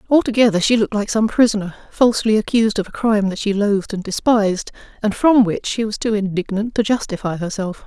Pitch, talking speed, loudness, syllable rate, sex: 210 Hz, 200 wpm, -18 LUFS, 6.2 syllables/s, female